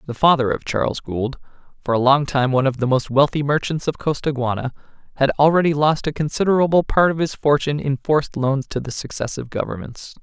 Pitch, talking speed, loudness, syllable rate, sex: 140 Hz, 195 wpm, -19 LUFS, 6.1 syllables/s, male